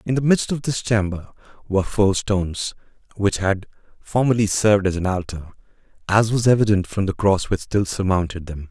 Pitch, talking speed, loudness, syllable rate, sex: 100 Hz, 180 wpm, -20 LUFS, 5.3 syllables/s, male